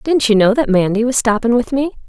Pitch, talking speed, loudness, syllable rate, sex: 240 Hz, 260 wpm, -14 LUFS, 5.8 syllables/s, female